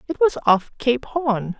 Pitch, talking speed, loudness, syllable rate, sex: 250 Hz, 190 wpm, -20 LUFS, 3.9 syllables/s, female